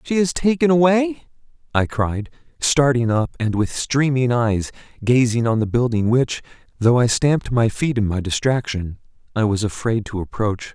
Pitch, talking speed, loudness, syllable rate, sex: 120 Hz, 170 wpm, -19 LUFS, 4.7 syllables/s, male